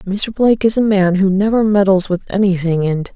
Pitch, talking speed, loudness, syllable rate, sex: 195 Hz, 210 wpm, -14 LUFS, 5.2 syllables/s, female